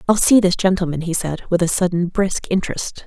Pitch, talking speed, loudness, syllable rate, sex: 180 Hz, 215 wpm, -18 LUFS, 5.6 syllables/s, female